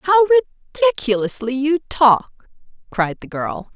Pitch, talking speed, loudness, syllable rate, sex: 275 Hz, 110 wpm, -18 LUFS, 3.4 syllables/s, female